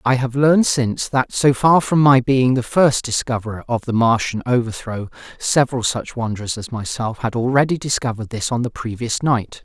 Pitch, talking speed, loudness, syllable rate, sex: 125 Hz, 185 wpm, -18 LUFS, 5.3 syllables/s, male